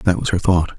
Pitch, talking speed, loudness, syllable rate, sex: 90 Hz, 305 wpm, -18 LUFS, 5.3 syllables/s, male